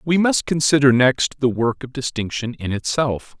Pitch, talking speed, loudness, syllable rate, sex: 130 Hz, 175 wpm, -19 LUFS, 4.6 syllables/s, male